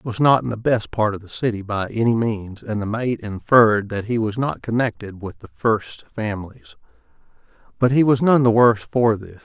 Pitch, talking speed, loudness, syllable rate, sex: 110 Hz, 215 wpm, -20 LUFS, 5.4 syllables/s, male